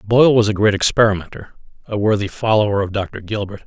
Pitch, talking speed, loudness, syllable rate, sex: 105 Hz, 180 wpm, -17 LUFS, 6.2 syllables/s, male